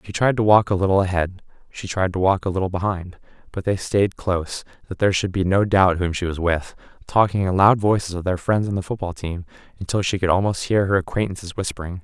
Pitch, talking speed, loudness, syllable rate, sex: 95 Hz, 230 wpm, -21 LUFS, 6.0 syllables/s, male